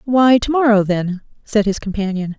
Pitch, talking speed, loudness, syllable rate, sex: 215 Hz, 175 wpm, -16 LUFS, 4.9 syllables/s, female